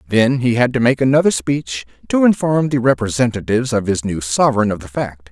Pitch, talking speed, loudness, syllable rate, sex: 120 Hz, 205 wpm, -16 LUFS, 5.8 syllables/s, male